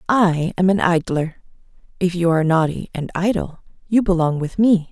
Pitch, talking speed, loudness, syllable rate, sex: 175 Hz, 170 wpm, -19 LUFS, 5.0 syllables/s, female